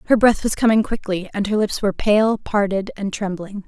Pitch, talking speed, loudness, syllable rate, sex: 205 Hz, 210 wpm, -20 LUFS, 5.3 syllables/s, female